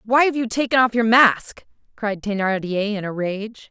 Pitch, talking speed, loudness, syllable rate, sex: 220 Hz, 195 wpm, -19 LUFS, 4.6 syllables/s, female